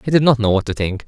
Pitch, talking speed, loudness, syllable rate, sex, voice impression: 115 Hz, 390 wpm, -17 LUFS, 7.2 syllables/s, male, masculine, adult-like, slightly clear, fluent, refreshing, sincere, slightly elegant